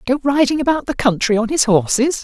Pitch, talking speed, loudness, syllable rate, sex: 260 Hz, 215 wpm, -16 LUFS, 5.8 syllables/s, female